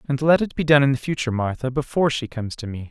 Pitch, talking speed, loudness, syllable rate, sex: 135 Hz, 270 wpm, -21 LUFS, 6.9 syllables/s, male